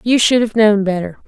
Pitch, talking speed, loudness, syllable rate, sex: 215 Hz, 235 wpm, -14 LUFS, 5.4 syllables/s, female